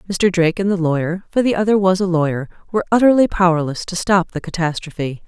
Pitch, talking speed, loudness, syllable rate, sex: 180 Hz, 180 wpm, -17 LUFS, 6.4 syllables/s, female